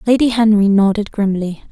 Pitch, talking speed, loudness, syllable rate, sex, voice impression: 210 Hz, 140 wpm, -14 LUFS, 5.3 syllables/s, female, slightly gender-neutral, young, calm